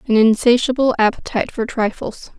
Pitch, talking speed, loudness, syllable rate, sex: 230 Hz, 125 wpm, -17 LUFS, 5.5 syllables/s, female